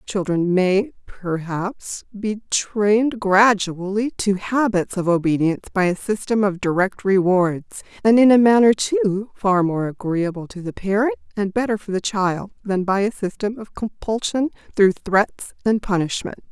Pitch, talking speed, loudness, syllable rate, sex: 200 Hz, 155 wpm, -20 LUFS, 4.3 syllables/s, female